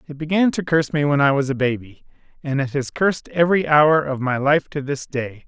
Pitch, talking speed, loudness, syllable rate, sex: 145 Hz, 240 wpm, -19 LUFS, 5.7 syllables/s, male